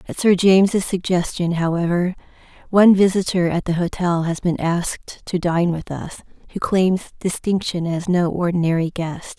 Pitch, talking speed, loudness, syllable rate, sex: 175 Hz, 155 wpm, -19 LUFS, 4.8 syllables/s, female